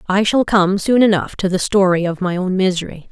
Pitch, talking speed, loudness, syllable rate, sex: 190 Hz, 230 wpm, -16 LUFS, 5.5 syllables/s, female